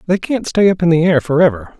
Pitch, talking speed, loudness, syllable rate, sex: 170 Hz, 265 wpm, -14 LUFS, 6.2 syllables/s, male